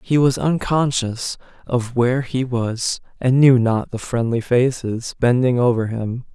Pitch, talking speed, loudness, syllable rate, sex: 125 Hz, 150 wpm, -19 LUFS, 4.1 syllables/s, male